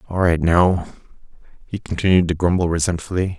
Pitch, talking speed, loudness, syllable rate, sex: 90 Hz, 140 wpm, -18 LUFS, 5.7 syllables/s, male